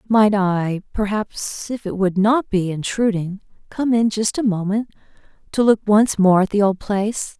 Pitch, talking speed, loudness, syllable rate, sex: 205 Hz, 180 wpm, -19 LUFS, 4.4 syllables/s, female